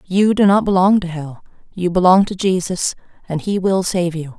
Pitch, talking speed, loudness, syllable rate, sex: 180 Hz, 205 wpm, -16 LUFS, 4.9 syllables/s, female